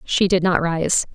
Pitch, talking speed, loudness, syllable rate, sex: 175 Hz, 210 wpm, -19 LUFS, 4.0 syllables/s, female